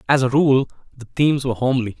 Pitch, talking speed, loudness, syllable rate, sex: 130 Hz, 210 wpm, -18 LUFS, 7.2 syllables/s, male